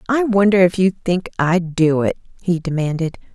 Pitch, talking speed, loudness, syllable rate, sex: 180 Hz, 180 wpm, -18 LUFS, 5.0 syllables/s, female